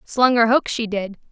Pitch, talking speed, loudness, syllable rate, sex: 230 Hz, 230 wpm, -19 LUFS, 4.5 syllables/s, female